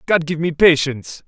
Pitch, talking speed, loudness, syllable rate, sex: 150 Hz, 190 wpm, -16 LUFS, 5.3 syllables/s, male